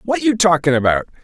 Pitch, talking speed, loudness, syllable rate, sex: 170 Hz, 195 wpm, -15 LUFS, 6.3 syllables/s, male